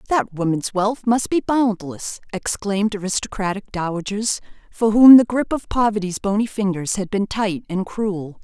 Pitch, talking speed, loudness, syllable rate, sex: 205 Hz, 155 wpm, -19 LUFS, 4.7 syllables/s, female